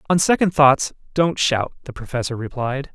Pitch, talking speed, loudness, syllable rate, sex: 140 Hz, 165 wpm, -19 LUFS, 5.0 syllables/s, male